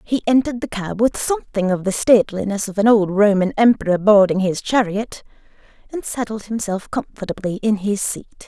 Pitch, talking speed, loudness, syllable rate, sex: 210 Hz, 170 wpm, -18 LUFS, 5.5 syllables/s, female